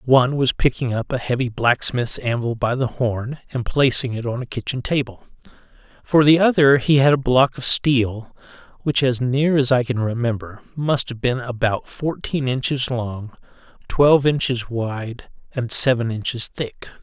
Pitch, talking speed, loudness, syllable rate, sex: 125 Hz, 170 wpm, -20 LUFS, 4.5 syllables/s, male